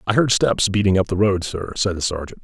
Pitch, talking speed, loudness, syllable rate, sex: 95 Hz, 270 wpm, -19 LUFS, 5.8 syllables/s, male